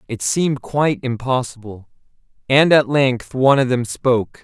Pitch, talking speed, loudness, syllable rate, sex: 125 Hz, 150 wpm, -17 LUFS, 5.0 syllables/s, male